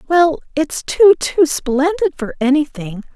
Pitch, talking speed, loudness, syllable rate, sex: 305 Hz, 135 wpm, -15 LUFS, 4.0 syllables/s, female